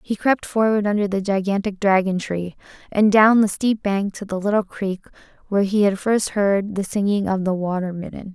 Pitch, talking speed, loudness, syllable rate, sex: 200 Hz, 200 wpm, -20 LUFS, 5.1 syllables/s, female